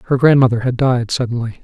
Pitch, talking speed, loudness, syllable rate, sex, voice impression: 125 Hz, 185 wpm, -15 LUFS, 6.3 syllables/s, male, very masculine, adult-like, slightly middle-aged, thick, relaxed, weak, very dark, slightly hard, muffled, slightly fluent, intellectual, sincere, very calm, slightly friendly, reassuring, slightly unique, elegant, sweet, kind, very modest, slightly light